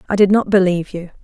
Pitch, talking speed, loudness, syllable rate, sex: 190 Hz, 245 wpm, -15 LUFS, 7.5 syllables/s, female